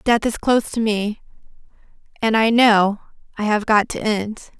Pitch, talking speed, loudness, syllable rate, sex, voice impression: 215 Hz, 170 wpm, -18 LUFS, 4.6 syllables/s, female, feminine, slightly young, tensed, clear, fluent, slightly cute, slightly sincere, friendly